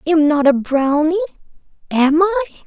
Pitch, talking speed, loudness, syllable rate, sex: 320 Hz, 155 wpm, -16 LUFS, 5.9 syllables/s, female